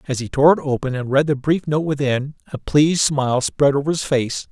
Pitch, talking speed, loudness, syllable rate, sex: 140 Hz, 240 wpm, -18 LUFS, 5.6 syllables/s, male